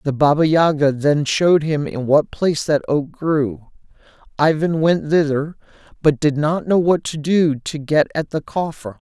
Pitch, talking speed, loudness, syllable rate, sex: 150 Hz, 180 wpm, -18 LUFS, 4.5 syllables/s, male